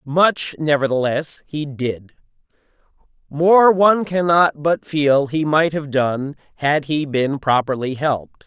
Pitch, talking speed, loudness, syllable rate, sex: 150 Hz, 130 wpm, -18 LUFS, 3.8 syllables/s, male